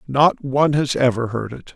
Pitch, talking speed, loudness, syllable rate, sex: 130 Hz, 205 wpm, -19 LUFS, 5.0 syllables/s, male